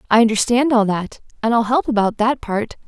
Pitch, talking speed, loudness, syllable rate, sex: 230 Hz, 210 wpm, -18 LUFS, 5.4 syllables/s, female